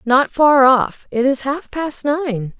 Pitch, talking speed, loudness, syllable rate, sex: 270 Hz, 160 wpm, -16 LUFS, 3.3 syllables/s, female